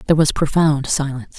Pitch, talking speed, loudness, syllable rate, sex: 145 Hz, 175 wpm, -18 LUFS, 5.9 syllables/s, female